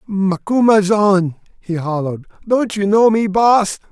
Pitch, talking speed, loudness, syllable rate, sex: 200 Hz, 125 wpm, -15 LUFS, 3.7 syllables/s, male